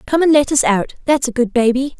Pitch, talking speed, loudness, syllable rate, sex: 265 Hz, 270 wpm, -15 LUFS, 5.8 syllables/s, female